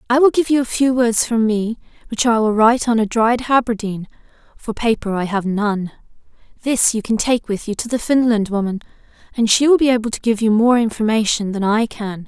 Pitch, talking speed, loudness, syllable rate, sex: 225 Hz, 220 wpm, -17 LUFS, 5.5 syllables/s, female